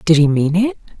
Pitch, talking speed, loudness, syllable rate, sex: 175 Hz, 240 wpm, -15 LUFS, 5.6 syllables/s, female